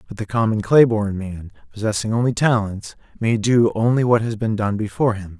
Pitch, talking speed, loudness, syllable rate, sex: 110 Hz, 200 wpm, -19 LUFS, 5.5 syllables/s, male